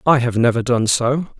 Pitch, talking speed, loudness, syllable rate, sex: 125 Hz, 215 wpm, -17 LUFS, 5.0 syllables/s, male